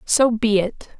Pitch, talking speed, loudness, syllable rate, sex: 220 Hz, 180 wpm, -19 LUFS, 3.7 syllables/s, female